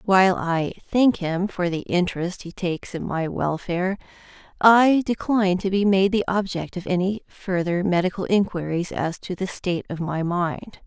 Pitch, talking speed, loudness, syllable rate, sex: 185 Hz, 170 wpm, -22 LUFS, 4.8 syllables/s, female